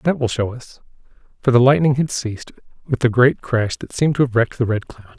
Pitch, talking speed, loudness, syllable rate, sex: 120 Hz, 245 wpm, -18 LUFS, 6.2 syllables/s, male